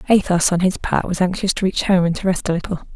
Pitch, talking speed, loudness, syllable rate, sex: 180 Hz, 285 wpm, -19 LUFS, 6.3 syllables/s, female